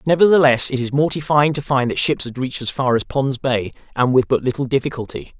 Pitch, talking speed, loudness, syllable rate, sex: 135 Hz, 225 wpm, -18 LUFS, 6.0 syllables/s, male